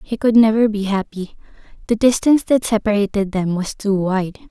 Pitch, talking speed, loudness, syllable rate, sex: 210 Hz, 175 wpm, -17 LUFS, 5.3 syllables/s, female